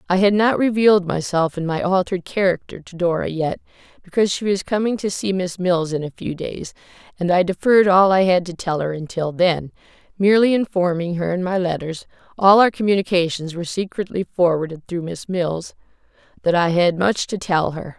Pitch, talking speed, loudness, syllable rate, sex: 180 Hz, 190 wpm, -19 LUFS, 4.5 syllables/s, female